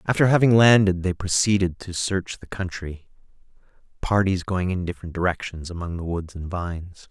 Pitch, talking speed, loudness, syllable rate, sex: 90 Hz, 160 wpm, -22 LUFS, 5.3 syllables/s, male